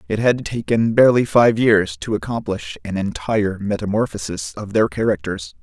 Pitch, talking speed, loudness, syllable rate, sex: 105 Hz, 150 wpm, -19 LUFS, 5.1 syllables/s, male